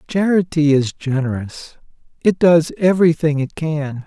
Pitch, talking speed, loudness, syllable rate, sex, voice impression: 155 Hz, 120 wpm, -17 LUFS, 4.4 syllables/s, male, masculine, adult-like, soft, calm, friendly, reassuring, kind